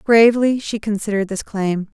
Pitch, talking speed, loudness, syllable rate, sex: 215 Hz, 150 wpm, -18 LUFS, 5.3 syllables/s, female